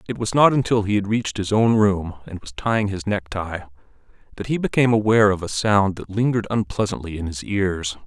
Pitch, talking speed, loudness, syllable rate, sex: 100 Hz, 210 wpm, -21 LUFS, 5.9 syllables/s, male